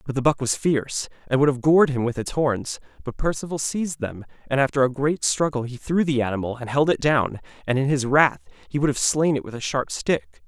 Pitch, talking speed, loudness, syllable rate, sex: 135 Hz, 245 wpm, -23 LUFS, 5.8 syllables/s, male